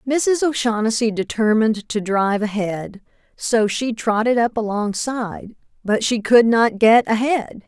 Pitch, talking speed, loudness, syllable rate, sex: 225 Hz, 135 wpm, -19 LUFS, 4.4 syllables/s, female